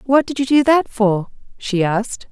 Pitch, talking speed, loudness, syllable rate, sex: 240 Hz, 205 wpm, -17 LUFS, 4.6 syllables/s, female